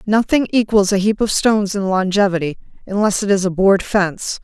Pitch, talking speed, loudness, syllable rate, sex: 200 Hz, 190 wpm, -16 LUFS, 5.5 syllables/s, female